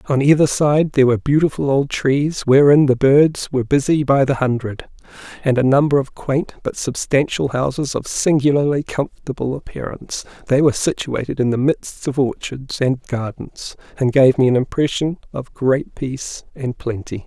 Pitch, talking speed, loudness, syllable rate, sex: 135 Hz, 165 wpm, -18 LUFS, 5.0 syllables/s, male